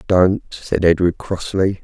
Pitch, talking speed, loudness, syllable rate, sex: 90 Hz, 130 wpm, -18 LUFS, 3.7 syllables/s, male